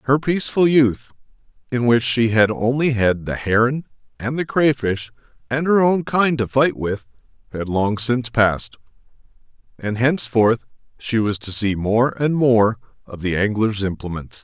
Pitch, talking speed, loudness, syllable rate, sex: 120 Hz, 160 wpm, -19 LUFS, 4.6 syllables/s, male